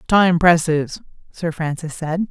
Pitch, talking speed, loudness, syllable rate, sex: 165 Hz, 130 wpm, -18 LUFS, 3.7 syllables/s, female